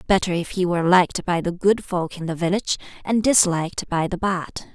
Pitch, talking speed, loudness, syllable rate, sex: 180 Hz, 215 wpm, -21 LUFS, 5.6 syllables/s, female